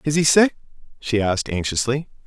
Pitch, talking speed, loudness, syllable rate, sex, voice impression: 130 Hz, 160 wpm, -20 LUFS, 5.7 syllables/s, male, masculine, adult-like, thick, powerful, slightly bright, clear, slightly halting, slightly cool, friendly, wild, lively, slightly sharp